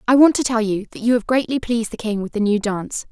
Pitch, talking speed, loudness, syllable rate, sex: 225 Hz, 310 wpm, -19 LUFS, 6.6 syllables/s, female